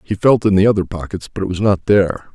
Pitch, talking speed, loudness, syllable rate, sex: 95 Hz, 280 wpm, -16 LUFS, 6.5 syllables/s, male